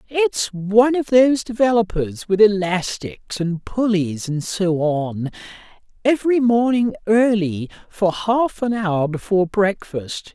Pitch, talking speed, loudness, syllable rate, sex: 205 Hz, 120 wpm, -19 LUFS, 4.0 syllables/s, male